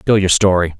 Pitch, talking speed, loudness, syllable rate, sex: 95 Hz, 225 wpm, -13 LUFS, 5.4 syllables/s, male